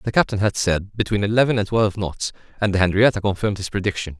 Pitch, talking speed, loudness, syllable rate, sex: 100 Hz, 215 wpm, -20 LUFS, 6.9 syllables/s, male